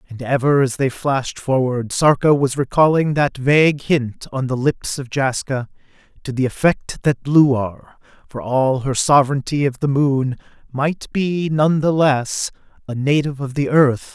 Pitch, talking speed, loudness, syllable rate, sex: 135 Hz, 155 wpm, -18 LUFS, 4.5 syllables/s, male